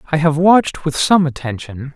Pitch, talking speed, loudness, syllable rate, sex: 155 Hz, 185 wpm, -15 LUFS, 5.3 syllables/s, male